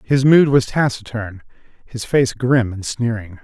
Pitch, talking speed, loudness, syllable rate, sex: 120 Hz, 155 wpm, -17 LUFS, 4.2 syllables/s, male